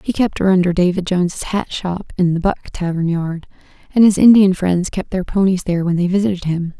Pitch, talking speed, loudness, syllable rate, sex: 185 Hz, 220 wpm, -16 LUFS, 5.5 syllables/s, female